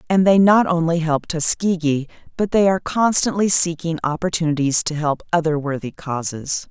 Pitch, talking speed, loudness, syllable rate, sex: 165 Hz, 150 wpm, -18 LUFS, 5.1 syllables/s, female